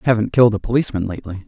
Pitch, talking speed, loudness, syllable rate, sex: 110 Hz, 205 wpm, -18 LUFS, 8.9 syllables/s, male